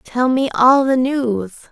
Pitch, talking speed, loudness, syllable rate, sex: 255 Hz, 175 wpm, -16 LUFS, 3.7 syllables/s, female